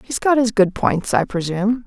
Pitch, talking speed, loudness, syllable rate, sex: 210 Hz, 225 wpm, -18 LUFS, 5.1 syllables/s, female